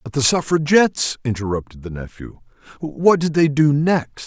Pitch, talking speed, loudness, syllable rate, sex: 140 Hz, 155 wpm, -18 LUFS, 4.8 syllables/s, male